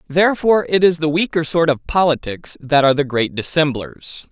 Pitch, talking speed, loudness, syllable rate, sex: 155 Hz, 180 wpm, -16 LUFS, 5.4 syllables/s, male